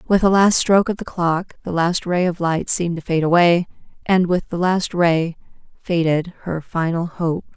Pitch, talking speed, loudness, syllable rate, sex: 175 Hz, 200 wpm, -19 LUFS, 4.8 syllables/s, female